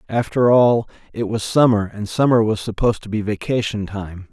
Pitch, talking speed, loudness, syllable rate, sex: 110 Hz, 165 wpm, -18 LUFS, 5.2 syllables/s, male